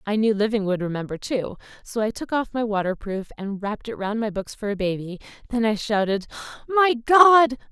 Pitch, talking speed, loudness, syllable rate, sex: 220 Hz, 200 wpm, -22 LUFS, 5.6 syllables/s, female